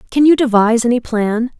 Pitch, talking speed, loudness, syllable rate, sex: 240 Hz, 190 wpm, -14 LUFS, 6.1 syllables/s, female